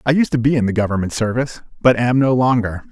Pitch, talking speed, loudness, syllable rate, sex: 120 Hz, 245 wpm, -17 LUFS, 6.6 syllables/s, male